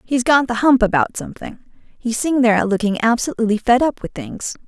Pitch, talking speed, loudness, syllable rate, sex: 235 Hz, 195 wpm, -17 LUFS, 5.9 syllables/s, female